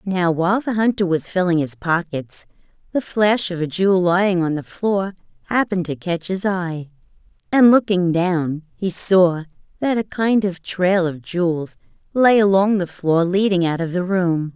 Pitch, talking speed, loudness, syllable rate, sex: 180 Hz, 175 wpm, -19 LUFS, 4.5 syllables/s, female